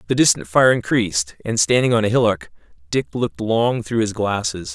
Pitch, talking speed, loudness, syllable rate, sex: 110 Hz, 190 wpm, -19 LUFS, 5.4 syllables/s, male